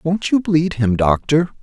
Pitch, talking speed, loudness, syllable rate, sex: 155 Hz, 185 wpm, -17 LUFS, 4.0 syllables/s, male